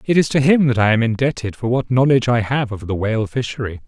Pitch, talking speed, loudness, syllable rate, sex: 120 Hz, 265 wpm, -18 LUFS, 6.5 syllables/s, male